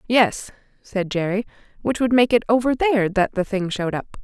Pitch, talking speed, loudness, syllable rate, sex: 215 Hz, 200 wpm, -21 LUFS, 5.4 syllables/s, female